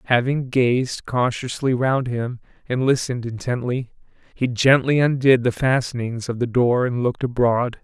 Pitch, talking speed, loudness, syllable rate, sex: 125 Hz, 145 wpm, -20 LUFS, 4.6 syllables/s, male